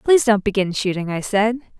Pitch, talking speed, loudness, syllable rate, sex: 210 Hz, 200 wpm, -19 LUFS, 6.0 syllables/s, female